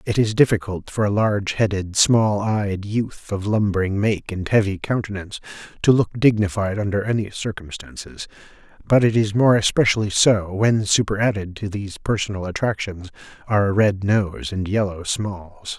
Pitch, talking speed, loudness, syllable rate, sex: 100 Hz, 155 wpm, -20 LUFS, 5.0 syllables/s, male